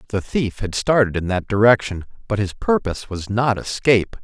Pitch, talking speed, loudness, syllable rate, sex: 105 Hz, 185 wpm, -20 LUFS, 5.3 syllables/s, male